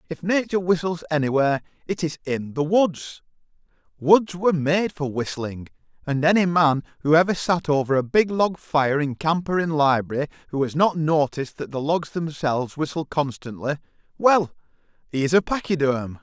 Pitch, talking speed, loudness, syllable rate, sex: 155 Hz, 165 wpm, -22 LUFS, 5.1 syllables/s, male